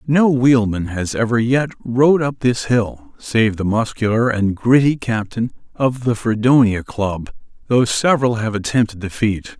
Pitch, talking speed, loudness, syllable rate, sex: 115 Hz, 155 wpm, -17 LUFS, 4.3 syllables/s, male